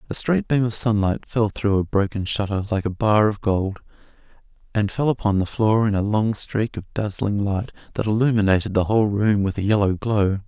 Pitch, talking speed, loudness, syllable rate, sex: 105 Hz, 205 wpm, -21 LUFS, 5.3 syllables/s, male